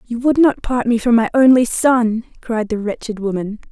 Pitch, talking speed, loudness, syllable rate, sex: 235 Hz, 210 wpm, -16 LUFS, 4.9 syllables/s, female